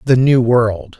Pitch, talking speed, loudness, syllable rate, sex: 115 Hz, 180 wpm, -13 LUFS, 3.5 syllables/s, male